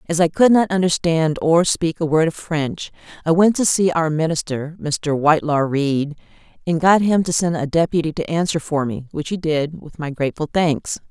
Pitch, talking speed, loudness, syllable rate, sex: 160 Hz, 205 wpm, -19 LUFS, 4.9 syllables/s, female